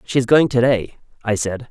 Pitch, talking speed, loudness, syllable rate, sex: 120 Hz, 210 wpm, -17 LUFS, 4.4 syllables/s, male